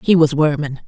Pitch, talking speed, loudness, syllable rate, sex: 155 Hz, 205 wpm, -16 LUFS, 5.6 syllables/s, female